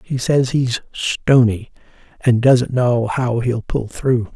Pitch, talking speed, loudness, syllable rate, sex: 120 Hz, 150 wpm, -17 LUFS, 3.3 syllables/s, male